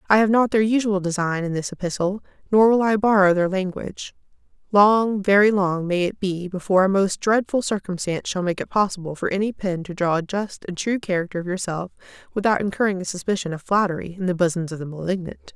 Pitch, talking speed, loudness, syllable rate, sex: 190 Hz, 210 wpm, -21 LUFS, 6.0 syllables/s, female